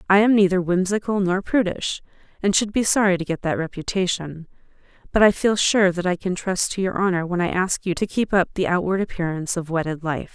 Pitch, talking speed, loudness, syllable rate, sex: 185 Hz, 220 wpm, -21 LUFS, 5.7 syllables/s, female